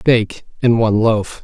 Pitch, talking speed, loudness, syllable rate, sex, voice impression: 110 Hz, 170 wpm, -15 LUFS, 4.3 syllables/s, male, very masculine, very middle-aged, very thick, tensed, powerful, slightly dark, slightly soft, clear, fluent, slightly cool, intellectual, slightly refreshing, very sincere, calm, mature, friendly, reassuring, slightly unique, elegant, wild, sweet, slightly lively, kind, slightly modest